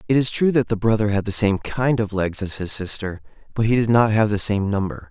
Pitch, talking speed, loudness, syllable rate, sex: 105 Hz, 270 wpm, -20 LUFS, 5.6 syllables/s, male